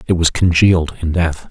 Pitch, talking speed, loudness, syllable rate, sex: 85 Hz, 200 wpm, -15 LUFS, 5.4 syllables/s, male